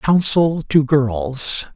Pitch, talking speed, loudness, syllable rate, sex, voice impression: 145 Hz, 105 wpm, -17 LUFS, 2.4 syllables/s, male, very masculine, very old, thick, very relaxed, very weak, slightly bright, soft, slightly muffled, slightly halting, slightly raspy, intellectual, very sincere, calm, very mature, very friendly, very reassuring, elegant, slightly sweet, slightly lively, very kind, very modest, very light